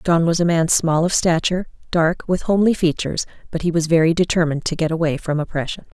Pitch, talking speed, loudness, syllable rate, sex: 165 Hz, 210 wpm, -19 LUFS, 6.5 syllables/s, female